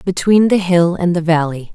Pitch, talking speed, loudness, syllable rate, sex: 175 Hz, 205 wpm, -14 LUFS, 4.9 syllables/s, female